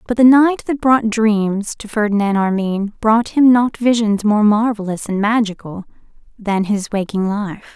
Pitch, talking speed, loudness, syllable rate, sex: 215 Hz, 160 wpm, -16 LUFS, 4.5 syllables/s, female